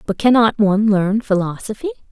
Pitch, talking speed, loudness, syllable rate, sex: 210 Hz, 140 wpm, -16 LUFS, 5.6 syllables/s, female